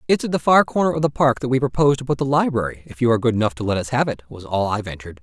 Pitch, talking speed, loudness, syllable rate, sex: 125 Hz, 335 wpm, -20 LUFS, 7.7 syllables/s, male